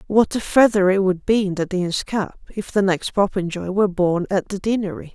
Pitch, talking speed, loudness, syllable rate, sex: 195 Hz, 220 wpm, -20 LUFS, 5.1 syllables/s, female